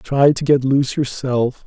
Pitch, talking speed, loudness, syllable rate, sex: 135 Hz, 180 wpm, -17 LUFS, 4.3 syllables/s, male